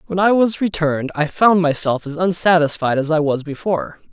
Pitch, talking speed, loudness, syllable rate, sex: 165 Hz, 190 wpm, -17 LUFS, 5.5 syllables/s, male